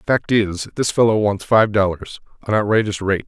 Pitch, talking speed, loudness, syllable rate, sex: 105 Hz, 165 wpm, -18 LUFS, 4.9 syllables/s, male